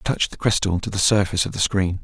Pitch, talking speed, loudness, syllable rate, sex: 95 Hz, 295 wpm, -21 LUFS, 7.4 syllables/s, male